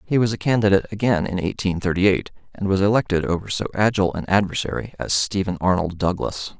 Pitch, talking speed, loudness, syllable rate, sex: 95 Hz, 190 wpm, -21 LUFS, 6.2 syllables/s, male